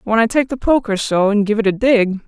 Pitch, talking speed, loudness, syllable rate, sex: 220 Hz, 240 wpm, -16 LUFS, 5.6 syllables/s, female